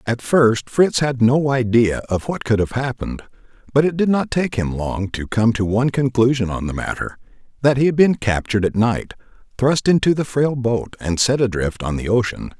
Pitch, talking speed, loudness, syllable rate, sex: 120 Hz, 210 wpm, -19 LUFS, 5.2 syllables/s, male